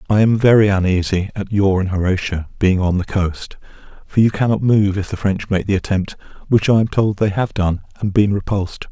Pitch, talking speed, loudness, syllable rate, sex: 100 Hz, 215 wpm, -17 LUFS, 5.4 syllables/s, male